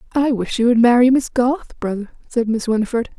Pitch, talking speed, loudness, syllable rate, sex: 240 Hz, 205 wpm, -17 LUFS, 5.7 syllables/s, female